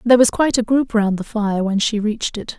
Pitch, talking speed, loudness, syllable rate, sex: 220 Hz, 280 wpm, -18 LUFS, 6.0 syllables/s, female